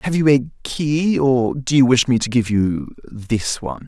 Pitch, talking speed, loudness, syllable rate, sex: 130 Hz, 215 wpm, -18 LUFS, 4.8 syllables/s, male